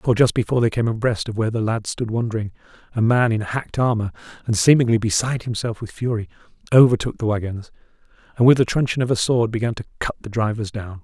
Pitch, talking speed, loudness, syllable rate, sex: 115 Hz, 210 wpm, -20 LUFS, 6.6 syllables/s, male